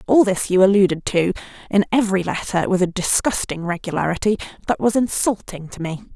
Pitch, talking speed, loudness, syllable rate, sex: 195 Hz, 165 wpm, -19 LUFS, 5.8 syllables/s, female